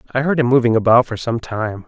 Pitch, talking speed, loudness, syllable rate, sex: 120 Hz, 255 wpm, -16 LUFS, 6.4 syllables/s, male